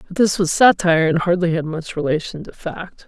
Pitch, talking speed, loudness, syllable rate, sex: 170 Hz, 215 wpm, -18 LUFS, 5.5 syllables/s, female